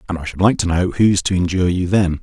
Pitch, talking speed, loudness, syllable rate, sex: 90 Hz, 295 wpm, -17 LUFS, 6.5 syllables/s, male